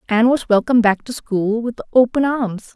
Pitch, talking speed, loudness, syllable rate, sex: 235 Hz, 195 wpm, -17 LUFS, 5.3 syllables/s, female